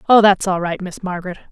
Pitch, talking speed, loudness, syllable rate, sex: 190 Hz, 235 wpm, -18 LUFS, 6.6 syllables/s, female